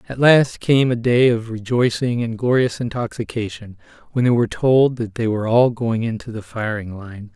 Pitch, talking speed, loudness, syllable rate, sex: 115 Hz, 190 wpm, -19 LUFS, 5.0 syllables/s, male